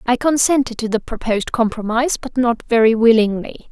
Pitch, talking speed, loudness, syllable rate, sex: 235 Hz, 145 wpm, -17 LUFS, 5.8 syllables/s, female